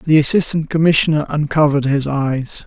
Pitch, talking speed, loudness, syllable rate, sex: 150 Hz, 135 wpm, -16 LUFS, 5.5 syllables/s, male